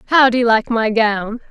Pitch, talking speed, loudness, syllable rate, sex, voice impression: 230 Hz, 240 wpm, -15 LUFS, 4.9 syllables/s, female, very feminine, slightly adult-like, slightly thin, tensed, slightly weak, slightly bright, hard, clear, fluent, cute, intellectual, refreshing, sincere, calm, friendly, reassuring, unique, slightly elegant, wild, slightly sweet, lively, strict, sharp